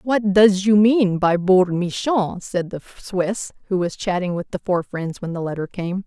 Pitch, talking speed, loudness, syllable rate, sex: 190 Hz, 210 wpm, -20 LUFS, 4.5 syllables/s, female